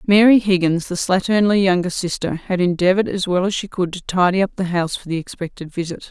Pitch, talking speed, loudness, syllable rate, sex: 185 Hz, 215 wpm, -18 LUFS, 6.0 syllables/s, female